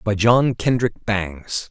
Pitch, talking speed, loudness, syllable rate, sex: 110 Hz, 140 wpm, -19 LUFS, 3.4 syllables/s, male